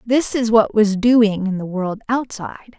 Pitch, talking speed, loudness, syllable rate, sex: 215 Hz, 195 wpm, -17 LUFS, 4.6 syllables/s, female